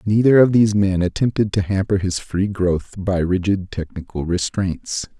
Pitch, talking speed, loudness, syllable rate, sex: 95 Hz, 160 wpm, -19 LUFS, 4.6 syllables/s, male